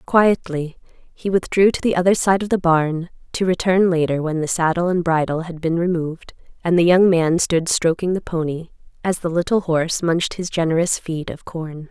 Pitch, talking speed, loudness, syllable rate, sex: 170 Hz, 195 wpm, -19 LUFS, 5.1 syllables/s, female